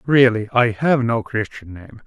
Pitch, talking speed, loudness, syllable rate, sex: 120 Hz, 175 wpm, -18 LUFS, 4.2 syllables/s, male